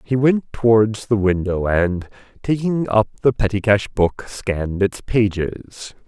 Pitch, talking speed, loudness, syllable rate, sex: 105 Hz, 140 wpm, -19 LUFS, 3.9 syllables/s, male